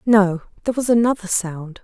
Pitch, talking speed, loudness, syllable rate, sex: 205 Hz, 165 wpm, -19 LUFS, 5.4 syllables/s, female